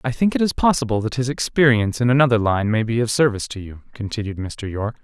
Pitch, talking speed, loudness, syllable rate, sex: 115 Hz, 240 wpm, -20 LUFS, 6.6 syllables/s, male